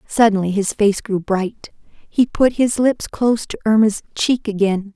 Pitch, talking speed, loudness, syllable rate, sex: 215 Hz, 170 wpm, -18 LUFS, 4.3 syllables/s, female